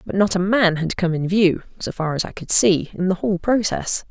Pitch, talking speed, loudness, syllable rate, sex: 185 Hz, 265 wpm, -20 LUFS, 5.3 syllables/s, female